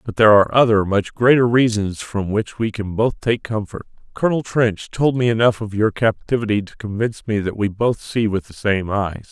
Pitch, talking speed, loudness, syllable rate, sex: 110 Hz, 215 wpm, -19 LUFS, 5.3 syllables/s, male